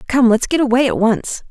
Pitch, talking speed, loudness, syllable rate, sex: 230 Hz, 240 wpm, -15 LUFS, 5.3 syllables/s, female